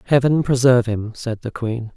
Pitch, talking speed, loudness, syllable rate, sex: 120 Hz, 185 wpm, -19 LUFS, 5.3 syllables/s, male